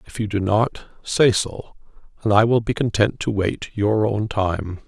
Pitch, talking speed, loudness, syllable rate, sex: 105 Hz, 195 wpm, -21 LUFS, 4.4 syllables/s, male